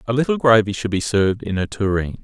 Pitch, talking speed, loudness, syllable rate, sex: 110 Hz, 240 wpm, -19 LUFS, 6.3 syllables/s, male